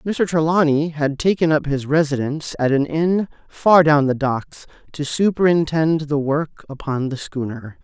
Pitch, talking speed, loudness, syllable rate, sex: 150 Hz, 160 wpm, -19 LUFS, 4.4 syllables/s, male